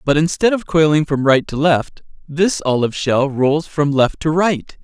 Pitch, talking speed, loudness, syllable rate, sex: 150 Hz, 200 wpm, -16 LUFS, 4.5 syllables/s, male